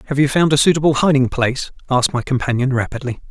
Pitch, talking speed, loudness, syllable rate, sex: 135 Hz, 200 wpm, -17 LUFS, 7.0 syllables/s, male